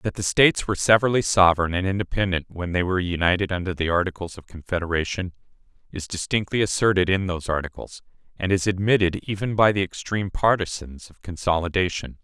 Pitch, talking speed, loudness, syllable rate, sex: 95 Hz, 160 wpm, -22 LUFS, 6.3 syllables/s, male